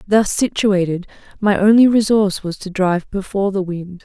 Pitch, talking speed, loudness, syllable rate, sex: 195 Hz, 165 wpm, -17 LUFS, 5.3 syllables/s, female